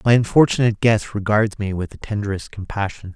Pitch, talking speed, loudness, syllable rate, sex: 105 Hz, 170 wpm, -20 LUFS, 5.9 syllables/s, male